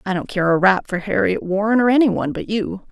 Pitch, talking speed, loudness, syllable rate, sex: 200 Hz, 245 wpm, -18 LUFS, 5.8 syllables/s, female